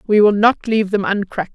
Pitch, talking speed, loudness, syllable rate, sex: 205 Hz, 235 wpm, -16 LUFS, 6.3 syllables/s, female